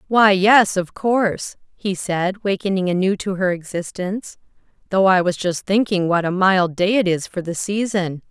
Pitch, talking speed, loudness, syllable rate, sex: 190 Hz, 180 wpm, -19 LUFS, 4.8 syllables/s, female